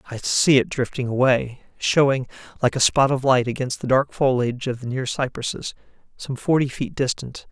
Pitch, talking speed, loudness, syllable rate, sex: 130 Hz, 185 wpm, -21 LUFS, 5.2 syllables/s, male